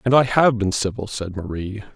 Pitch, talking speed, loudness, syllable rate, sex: 110 Hz, 215 wpm, -21 LUFS, 5.2 syllables/s, male